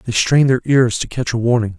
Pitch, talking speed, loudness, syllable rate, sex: 120 Hz, 270 wpm, -16 LUFS, 5.8 syllables/s, male